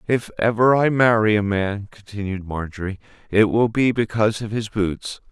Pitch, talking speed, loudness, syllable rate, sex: 110 Hz, 170 wpm, -20 LUFS, 4.9 syllables/s, male